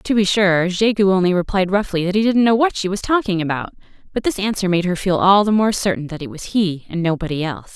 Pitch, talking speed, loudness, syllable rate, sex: 190 Hz, 255 wpm, -18 LUFS, 6.1 syllables/s, female